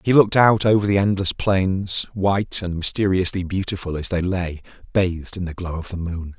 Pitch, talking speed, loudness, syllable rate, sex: 95 Hz, 195 wpm, -21 LUFS, 5.3 syllables/s, male